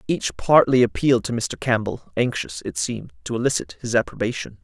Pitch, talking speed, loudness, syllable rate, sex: 115 Hz, 170 wpm, -22 LUFS, 5.6 syllables/s, male